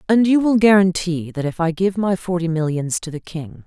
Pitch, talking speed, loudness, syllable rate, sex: 180 Hz, 230 wpm, -18 LUFS, 5.2 syllables/s, female